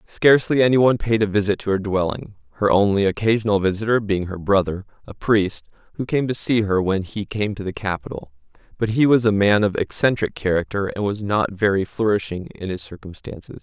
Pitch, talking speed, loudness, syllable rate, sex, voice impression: 100 Hz, 195 wpm, -20 LUFS, 5.6 syllables/s, male, very masculine, very adult-like, middle-aged, thick, slightly relaxed, weak, dark, very soft, muffled, slightly halting, very cool, intellectual, slightly refreshing, very sincere, very calm, mature, very friendly, very reassuring, slightly unique, elegant, wild, very sweet, lively, very kind, slightly modest